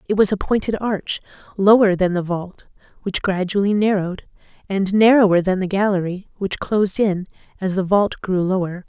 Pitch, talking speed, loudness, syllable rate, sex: 195 Hz, 170 wpm, -19 LUFS, 5.2 syllables/s, female